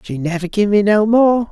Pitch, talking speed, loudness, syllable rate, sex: 205 Hz, 240 wpm, -15 LUFS, 5.0 syllables/s, male